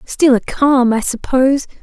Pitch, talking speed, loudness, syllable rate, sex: 260 Hz, 165 wpm, -14 LUFS, 4.4 syllables/s, female